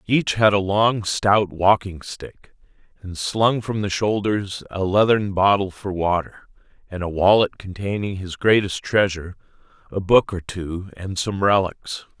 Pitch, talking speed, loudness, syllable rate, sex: 100 Hz, 150 wpm, -20 LUFS, 4.2 syllables/s, male